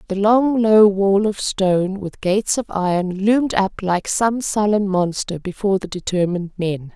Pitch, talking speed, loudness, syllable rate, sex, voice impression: 195 Hz, 170 wpm, -18 LUFS, 4.7 syllables/s, female, very feminine, slightly adult-like, thin, slightly tensed, slightly powerful, bright, slightly hard, clear, fluent, cute, slightly cool, intellectual, refreshing, very sincere, very calm, very friendly, reassuring, slightly unique, elegant, slightly sweet, slightly lively, kind, slightly modest, slightly light